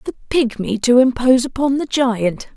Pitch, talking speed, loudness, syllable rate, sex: 245 Hz, 165 wpm, -16 LUFS, 5.0 syllables/s, female